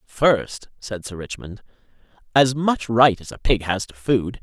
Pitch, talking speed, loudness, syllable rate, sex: 115 Hz, 175 wpm, -21 LUFS, 4.1 syllables/s, male